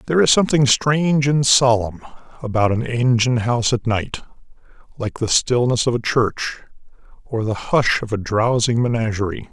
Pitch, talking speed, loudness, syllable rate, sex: 120 Hz, 160 wpm, -18 LUFS, 5.2 syllables/s, male